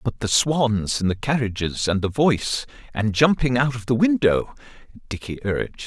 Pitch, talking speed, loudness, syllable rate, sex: 120 Hz, 165 wpm, -21 LUFS, 4.9 syllables/s, male